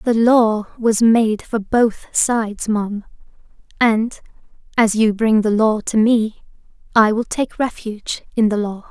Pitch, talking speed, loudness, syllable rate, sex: 220 Hz, 155 wpm, -17 LUFS, 4.0 syllables/s, female